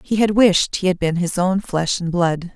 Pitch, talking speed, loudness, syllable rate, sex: 180 Hz, 260 wpm, -18 LUFS, 4.5 syllables/s, female